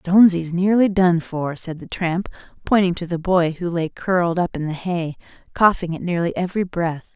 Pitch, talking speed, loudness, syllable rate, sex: 175 Hz, 195 wpm, -20 LUFS, 5.2 syllables/s, female